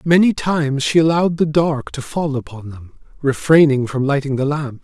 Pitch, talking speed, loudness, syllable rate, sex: 145 Hz, 185 wpm, -17 LUFS, 5.2 syllables/s, male